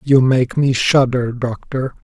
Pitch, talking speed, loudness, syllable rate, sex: 125 Hz, 140 wpm, -16 LUFS, 3.7 syllables/s, male